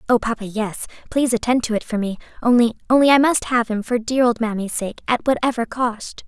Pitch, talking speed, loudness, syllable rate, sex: 235 Hz, 200 wpm, -19 LUFS, 5.8 syllables/s, female